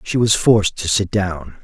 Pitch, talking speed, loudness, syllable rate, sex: 100 Hz, 220 wpm, -17 LUFS, 4.7 syllables/s, male